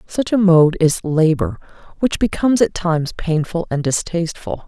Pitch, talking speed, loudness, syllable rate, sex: 175 Hz, 155 wpm, -17 LUFS, 5.0 syllables/s, female